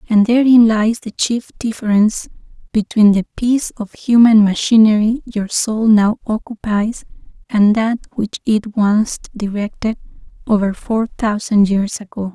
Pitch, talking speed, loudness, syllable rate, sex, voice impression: 215 Hz, 130 wpm, -15 LUFS, 4.3 syllables/s, female, very feminine, young, very thin, slightly relaxed, slightly weak, slightly dark, slightly hard, clear, fluent, very cute, intellectual, refreshing, sincere, very calm, very friendly, very reassuring, slightly unique, very elegant, very sweet, very kind, modest